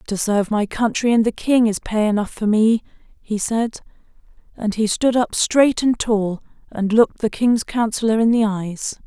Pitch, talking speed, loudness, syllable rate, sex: 220 Hz, 190 wpm, -19 LUFS, 4.7 syllables/s, female